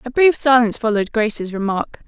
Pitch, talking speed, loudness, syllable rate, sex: 230 Hz, 175 wpm, -17 LUFS, 6.1 syllables/s, female